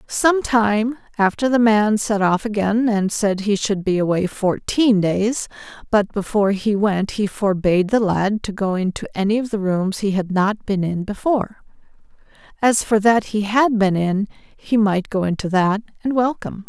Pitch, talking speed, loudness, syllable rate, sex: 205 Hz, 185 wpm, -19 LUFS, 4.5 syllables/s, female